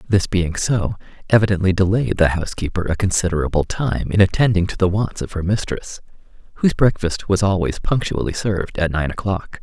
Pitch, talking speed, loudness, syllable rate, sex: 95 Hz, 170 wpm, -19 LUFS, 5.6 syllables/s, male